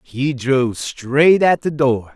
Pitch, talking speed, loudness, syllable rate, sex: 135 Hz, 165 wpm, -16 LUFS, 3.4 syllables/s, male